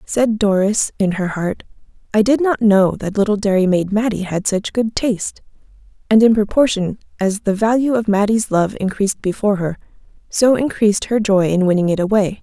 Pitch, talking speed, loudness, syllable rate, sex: 205 Hz, 185 wpm, -17 LUFS, 5.3 syllables/s, female